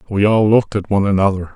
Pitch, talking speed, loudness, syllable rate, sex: 100 Hz, 230 wpm, -15 LUFS, 7.4 syllables/s, male